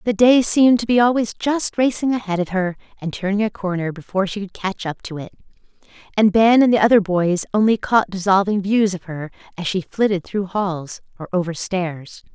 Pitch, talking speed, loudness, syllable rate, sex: 200 Hz, 205 wpm, -19 LUFS, 5.3 syllables/s, female